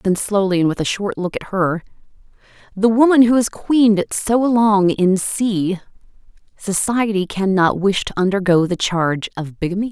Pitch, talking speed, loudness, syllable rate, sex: 195 Hz, 175 wpm, -17 LUFS, 4.8 syllables/s, female